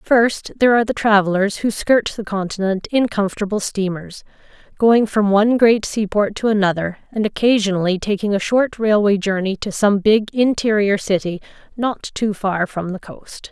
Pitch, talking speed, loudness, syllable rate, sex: 205 Hz, 165 wpm, -18 LUFS, 5.0 syllables/s, female